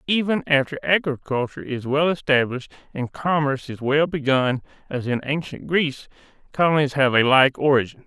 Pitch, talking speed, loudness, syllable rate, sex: 140 Hz, 150 wpm, -21 LUFS, 5.5 syllables/s, male